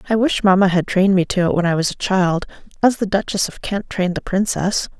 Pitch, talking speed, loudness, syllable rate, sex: 190 Hz, 250 wpm, -18 LUFS, 6.0 syllables/s, female